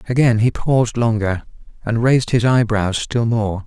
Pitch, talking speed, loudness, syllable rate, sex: 115 Hz, 165 wpm, -17 LUFS, 4.8 syllables/s, male